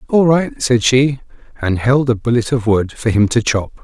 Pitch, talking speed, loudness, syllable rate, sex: 120 Hz, 220 wpm, -15 LUFS, 4.6 syllables/s, male